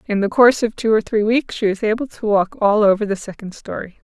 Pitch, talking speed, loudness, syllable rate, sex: 215 Hz, 260 wpm, -17 LUFS, 5.9 syllables/s, female